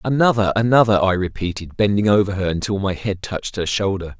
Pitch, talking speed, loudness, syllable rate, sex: 100 Hz, 185 wpm, -19 LUFS, 6.0 syllables/s, male